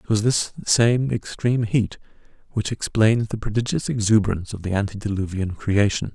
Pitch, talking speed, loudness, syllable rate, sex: 105 Hz, 145 wpm, -22 LUFS, 5.3 syllables/s, male